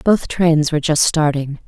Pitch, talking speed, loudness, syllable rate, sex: 155 Hz, 180 wpm, -16 LUFS, 4.6 syllables/s, female